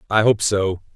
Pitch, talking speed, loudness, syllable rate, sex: 105 Hz, 190 wpm, -19 LUFS, 4.6 syllables/s, male